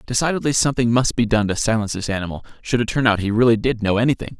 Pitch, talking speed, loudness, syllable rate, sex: 115 Hz, 245 wpm, -19 LUFS, 7.4 syllables/s, male